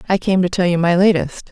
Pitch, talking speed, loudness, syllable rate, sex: 180 Hz, 280 wpm, -16 LUFS, 6.1 syllables/s, female